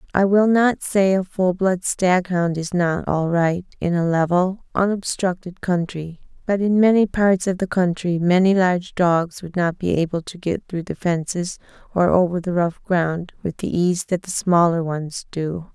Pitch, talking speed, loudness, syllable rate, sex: 180 Hz, 190 wpm, -20 LUFS, 4.3 syllables/s, female